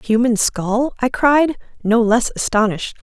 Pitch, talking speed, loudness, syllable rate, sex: 235 Hz, 155 wpm, -17 LUFS, 4.6 syllables/s, female